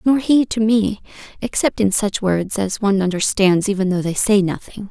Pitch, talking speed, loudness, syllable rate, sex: 205 Hz, 185 wpm, -18 LUFS, 5.0 syllables/s, female